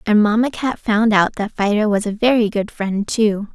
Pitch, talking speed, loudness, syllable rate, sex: 215 Hz, 220 wpm, -17 LUFS, 4.7 syllables/s, female